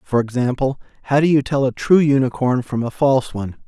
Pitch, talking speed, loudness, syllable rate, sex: 130 Hz, 210 wpm, -18 LUFS, 5.9 syllables/s, male